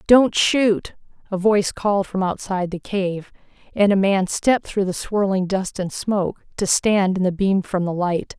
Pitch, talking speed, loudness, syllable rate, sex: 195 Hz, 195 wpm, -20 LUFS, 4.6 syllables/s, female